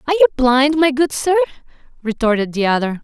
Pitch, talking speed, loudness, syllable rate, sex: 270 Hz, 180 wpm, -16 LUFS, 6.3 syllables/s, female